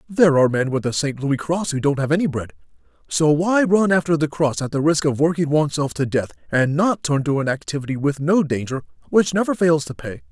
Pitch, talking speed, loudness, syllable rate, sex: 145 Hz, 240 wpm, -20 LUFS, 5.8 syllables/s, male